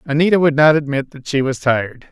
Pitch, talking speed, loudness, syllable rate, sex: 140 Hz, 225 wpm, -16 LUFS, 6.1 syllables/s, male